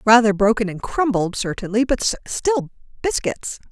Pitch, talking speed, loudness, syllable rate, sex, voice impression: 225 Hz, 130 wpm, -20 LUFS, 4.6 syllables/s, female, very feminine, very middle-aged, very thin, very tensed, powerful, bright, hard, very clear, very fluent, raspy, slightly cool, intellectual, refreshing, slightly sincere, slightly calm, slightly friendly, slightly reassuring, very unique, elegant, wild, slightly sweet, very lively, very strict, very intense, very sharp, light